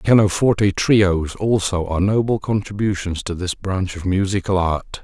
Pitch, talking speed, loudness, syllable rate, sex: 95 Hz, 155 wpm, -19 LUFS, 4.9 syllables/s, male